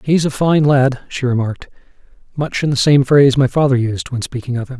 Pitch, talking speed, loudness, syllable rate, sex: 135 Hz, 225 wpm, -15 LUFS, 5.8 syllables/s, male